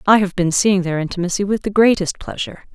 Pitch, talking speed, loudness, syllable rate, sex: 190 Hz, 220 wpm, -18 LUFS, 6.3 syllables/s, female